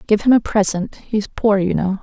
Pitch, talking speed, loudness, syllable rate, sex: 205 Hz, 235 wpm, -17 LUFS, 4.8 syllables/s, female